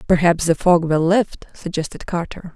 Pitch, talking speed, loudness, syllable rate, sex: 170 Hz, 165 wpm, -19 LUFS, 4.7 syllables/s, female